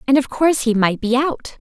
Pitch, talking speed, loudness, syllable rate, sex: 255 Hz, 250 wpm, -17 LUFS, 5.5 syllables/s, female